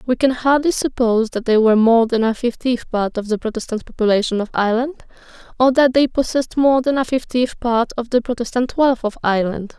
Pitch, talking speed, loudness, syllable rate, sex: 240 Hz, 200 wpm, -18 LUFS, 5.8 syllables/s, female